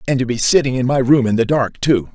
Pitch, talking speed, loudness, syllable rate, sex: 125 Hz, 310 wpm, -16 LUFS, 6.2 syllables/s, male